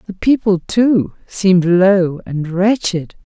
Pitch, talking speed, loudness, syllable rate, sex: 190 Hz, 125 wpm, -15 LUFS, 3.5 syllables/s, female